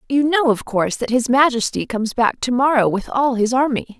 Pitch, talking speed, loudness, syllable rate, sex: 250 Hz, 225 wpm, -18 LUFS, 5.5 syllables/s, female